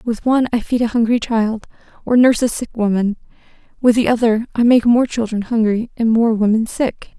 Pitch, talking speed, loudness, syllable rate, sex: 230 Hz, 200 wpm, -16 LUFS, 5.5 syllables/s, female